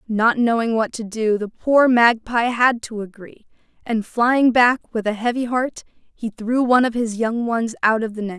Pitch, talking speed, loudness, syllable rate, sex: 230 Hz, 205 wpm, -19 LUFS, 4.5 syllables/s, female